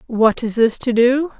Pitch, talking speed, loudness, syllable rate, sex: 240 Hz, 215 wpm, -16 LUFS, 4.2 syllables/s, female